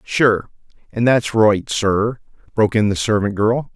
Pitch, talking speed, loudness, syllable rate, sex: 110 Hz, 160 wpm, -17 LUFS, 4.2 syllables/s, male